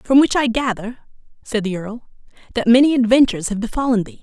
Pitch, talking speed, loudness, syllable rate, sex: 235 Hz, 185 wpm, -17 LUFS, 6.3 syllables/s, female